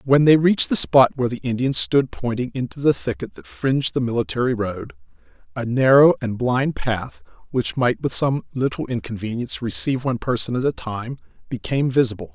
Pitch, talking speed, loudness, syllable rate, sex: 120 Hz, 180 wpm, -20 LUFS, 5.6 syllables/s, male